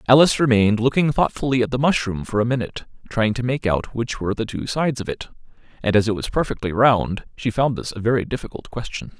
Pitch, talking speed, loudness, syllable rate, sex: 120 Hz, 220 wpm, -21 LUFS, 6.5 syllables/s, male